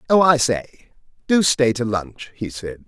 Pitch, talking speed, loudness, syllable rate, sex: 120 Hz, 190 wpm, -19 LUFS, 3.9 syllables/s, male